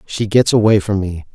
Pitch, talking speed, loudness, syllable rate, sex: 100 Hz, 225 wpm, -15 LUFS, 5.3 syllables/s, male